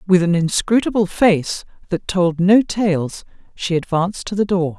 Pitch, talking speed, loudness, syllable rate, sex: 185 Hz, 165 wpm, -18 LUFS, 4.4 syllables/s, female